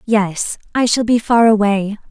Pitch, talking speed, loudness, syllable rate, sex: 215 Hz, 170 wpm, -15 LUFS, 4.1 syllables/s, female